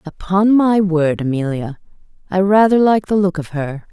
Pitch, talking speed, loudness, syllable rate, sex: 180 Hz, 170 wpm, -15 LUFS, 4.6 syllables/s, female